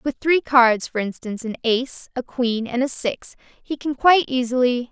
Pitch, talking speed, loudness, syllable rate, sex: 250 Hz, 195 wpm, -20 LUFS, 4.8 syllables/s, female